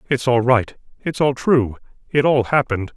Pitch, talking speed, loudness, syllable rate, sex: 125 Hz, 180 wpm, -18 LUFS, 5.1 syllables/s, male